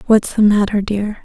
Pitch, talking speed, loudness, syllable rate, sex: 210 Hz, 240 wpm, -15 LUFS, 5.6 syllables/s, female